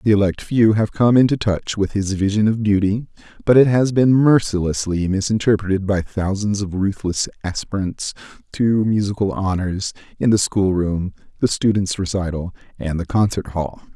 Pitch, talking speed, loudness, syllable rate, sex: 100 Hz, 155 wpm, -19 LUFS, 4.9 syllables/s, male